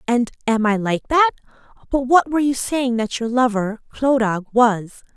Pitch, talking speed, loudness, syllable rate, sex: 240 Hz, 165 wpm, -19 LUFS, 4.7 syllables/s, female